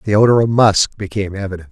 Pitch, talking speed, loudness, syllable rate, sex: 105 Hz, 210 wpm, -15 LUFS, 7.3 syllables/s, male